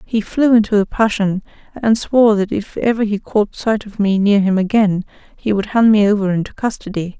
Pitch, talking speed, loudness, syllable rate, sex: 210 Hz, 210 wpm, -16 LUFS, 5.2 syllables/s, female